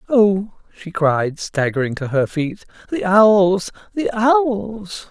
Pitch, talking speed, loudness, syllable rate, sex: 195 Hz, 130 wpm, -18 LUFS, 3.2 syllables/s, male